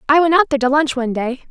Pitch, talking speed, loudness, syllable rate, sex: 280 Hz, 320 wpm, -16 LUFS, 8.1 syllables/s, female